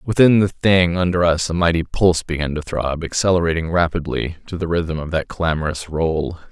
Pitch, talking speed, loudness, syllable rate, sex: 85 Hz, 185 wpm, -19 LUFS, 5.3 syllables/s, male